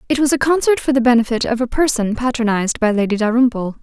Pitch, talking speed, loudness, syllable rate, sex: 240 Hz, 220 wpm, -16 LUFS, 6.7 syllables/s, female